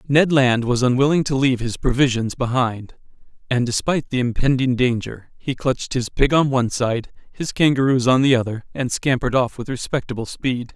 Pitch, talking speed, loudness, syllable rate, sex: 125 Hz, 180 wpm, -20 LUFS, 5.4 syllables/s, male